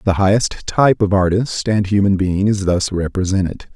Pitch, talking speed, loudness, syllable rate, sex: 100 Hz, 175 wpm, -16 LUFS, 5.0 syllables/s, male